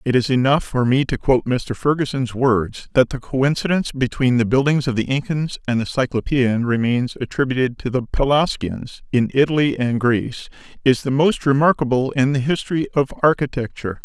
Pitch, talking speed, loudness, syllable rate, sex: 130 Hz, 170 wpm, -19 LUFS, 5.4 syllables/s, male